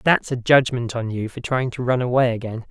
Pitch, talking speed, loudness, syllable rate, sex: 120 Hz, 245 wpm, -21 LUFS, 5.5 syllables/s, male